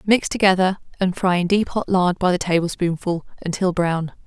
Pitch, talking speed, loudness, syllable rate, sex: 180 Hz, 185 wpm, -20 LUFS, 5.1 syllables/s, female